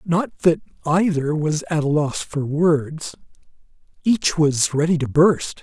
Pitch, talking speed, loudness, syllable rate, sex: 155 Hz, 150 wpm, -20 LUFS, 3.7 syllables/s, male